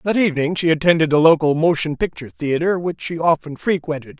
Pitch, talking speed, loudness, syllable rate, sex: 160 Hz, 185 wpm, -18 LUFS, 6.1 syllables/s, male